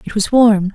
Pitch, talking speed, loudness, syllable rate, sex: 210 Hz, 240 wpm, -13 LUFS, 4.7 syllables/s, female